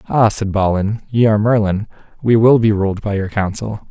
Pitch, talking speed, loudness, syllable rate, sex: 105 Hz, 200 wpm, -16 LUFS, 5.3 syllables/s, male